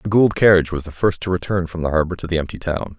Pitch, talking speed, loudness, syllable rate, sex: 85 Hz, 300 wpm, -19 LUFS, 6.8 syllables/s, male